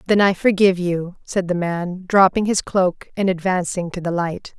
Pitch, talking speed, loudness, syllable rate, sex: 185 Hz, 195 wpm, -19 LUFS, 4.7 syllables/s, female